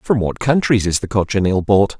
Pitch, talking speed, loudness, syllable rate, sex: 105 Hz, 210 wpm, -17 LUFS, 5.1 syllables/s, male